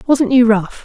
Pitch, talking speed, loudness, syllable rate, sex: 240 Hz, 215 wpm, -12 LUFS, 4.4 syllables/s, female